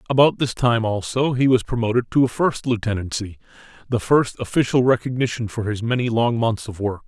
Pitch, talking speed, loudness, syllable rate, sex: 115 Hz, 185 wpm, -20 LUFS, 5.5 syllables/s, male